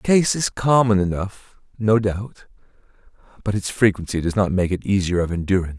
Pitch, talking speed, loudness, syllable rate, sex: 100 Hz, 175 wpm, -20 LUFS, 5.4 syllables/s, male